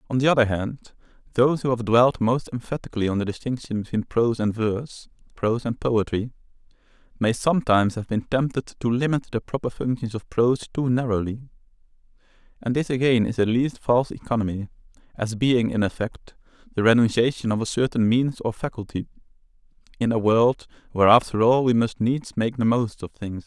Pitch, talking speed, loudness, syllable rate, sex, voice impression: 120 Hz, 175 wpm, -23 LUFS, 5.7 syllables/s, male, very masculine, very adult-like, middle-aged, very thick, slightly relaxed, slightly weak, slightly bright, soft, clear, fluent, cool, very intellectual, refreshing, sincere, calm, slightly mature, friendly, reassuring, slightly unique, elegant, sweet, slightly lively, kind, slightly modest, slightly light